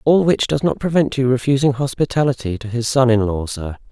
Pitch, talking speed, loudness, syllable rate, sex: 130 Hz, 215 wpm, -18 LUFS, 5.7 syllables/s, male